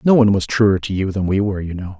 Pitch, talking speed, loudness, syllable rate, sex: 100 Hz, 330 wpm, -17 LUFS, 6.9 syllables/s, male